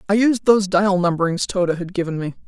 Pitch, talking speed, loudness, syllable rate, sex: 185 Hz, 220 wpm, -19 LUFS, 6.0 syllables/s, female